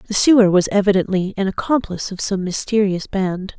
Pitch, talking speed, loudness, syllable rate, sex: 195 Hz, 165 wpm, -18 LUFS, 5.4 syllables/s, female